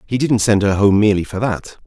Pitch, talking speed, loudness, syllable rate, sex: 105 Hz, 260 wpm, -16 LUFS, 5.9 syllables/s, male